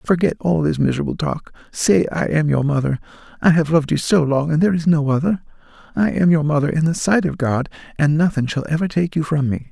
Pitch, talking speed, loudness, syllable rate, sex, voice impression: 150 Hz, 230 wpm, -18 LUFS, 6.1 syllables/s, male, masculine, middle-aged, soft, fluent, raspy, sincere, calm, mature, friendly, reassuring, wild, kind